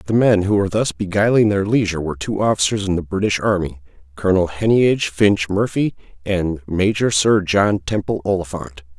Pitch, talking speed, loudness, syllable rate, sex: 95 Hz, 160 wpm, -18 LUFS, 5.4 syllables/s, male